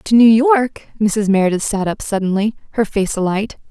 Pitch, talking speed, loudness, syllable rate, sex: 210 Hz, 180 wpm, -16 LUFS, 4.9 syllables/s, female